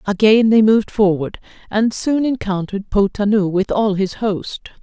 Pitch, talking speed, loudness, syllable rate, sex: 205 Hz, 150 wpm, -17 LUFS, 4.8 syllables/s, female